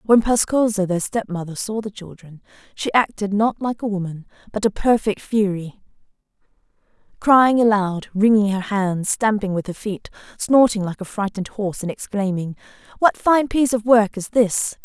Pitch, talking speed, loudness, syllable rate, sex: 210 Hz, 160 wpm, -20 LUFS, 4.9 syllables/s, female